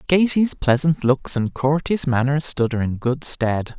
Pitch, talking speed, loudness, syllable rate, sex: 140 Hz, 175 wpm, -20 LUFS, 4.1 syllables/s, male